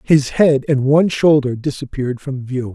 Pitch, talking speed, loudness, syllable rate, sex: 135 Hz, 175 wpm, -16 LUFS, 4.9 syllables/s, male